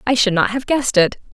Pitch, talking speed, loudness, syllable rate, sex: 225 Hz, 265 wpm, -17 LUFS, 6.4 syllables/s, female